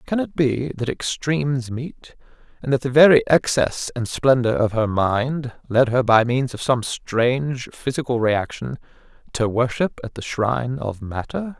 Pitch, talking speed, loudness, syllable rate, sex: 125 Hz, 165 wpm, -21 LUFS, 4.3 syllables/s, male